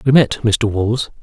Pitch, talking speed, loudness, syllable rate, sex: 115 Hz, 195 wpm, -16 LUFS, 4.0 syllables/s, male